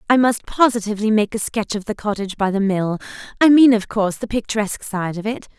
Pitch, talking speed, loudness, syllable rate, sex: 215 Hz, 215 wpm, -19 LUFS, 6.4 syllables/s, female